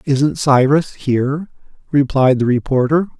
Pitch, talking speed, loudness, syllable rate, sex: 140 Hz, 115 wpm, -16 LUFS, 4.3 syllables/s, male